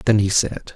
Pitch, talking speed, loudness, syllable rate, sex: 105 Hz, 240 wpm, -19 LUFS, 4.9 syllables/s, male